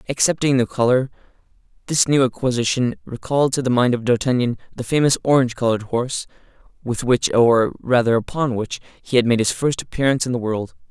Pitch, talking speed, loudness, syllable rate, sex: 125 Hz, 175 wpm, -19 LUFS, 6.0 syllables/s, male